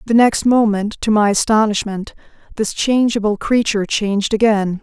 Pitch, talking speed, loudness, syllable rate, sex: 215 Hz, 135 wpm, -16 LUFS, 5.0 syllables/s, female